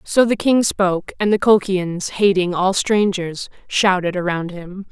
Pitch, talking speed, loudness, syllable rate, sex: 190 Hz, 160 wpm, -18 LUFS, 4.2 syllables/s, female